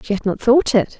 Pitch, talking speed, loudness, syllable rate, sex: 225 Hz, 305 wpm, -16 LUFS, 5.6 syllables/s, female